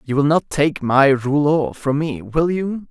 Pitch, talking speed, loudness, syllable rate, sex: 145 Hz, 205 wpm, -18 LUFS, 3.9 syllables/s, male